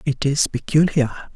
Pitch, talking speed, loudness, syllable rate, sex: 145 Hz, 135 wpm, -19 LUFS, 4.1 syllables/s, female